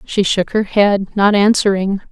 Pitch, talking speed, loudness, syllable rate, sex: 200 Hz, 170 wpm, -14 LUFS, 4.1 syllables/s, female